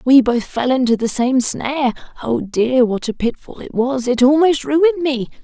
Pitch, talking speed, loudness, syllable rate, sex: 260 Hz, 200 wpm, -17 LUFS, 4.9 syllables/s, female